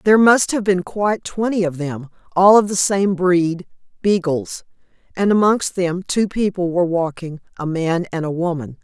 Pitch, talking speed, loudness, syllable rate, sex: 185 Hz, 165 wpm, -18 LUFS, 4.8 syllables/s, female